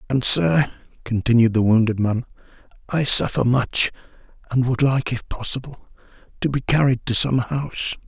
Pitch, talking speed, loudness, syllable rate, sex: 125 Hz, 150 wpm, -20 LUFS, 4.9 syllables/s, male